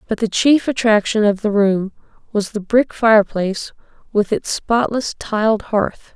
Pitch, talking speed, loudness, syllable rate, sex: 215 Hz, 155 wpm, -17 LUFS, 4.5 syllables/s, female